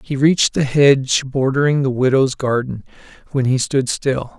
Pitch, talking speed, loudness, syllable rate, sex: 135 Hz, 165 wpm, -17 LUFS, 4.8 syllables/s, male